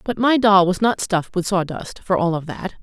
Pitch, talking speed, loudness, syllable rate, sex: 190 Hz, 255 wpm, -19 LUFS, 5.2 syllables/s, female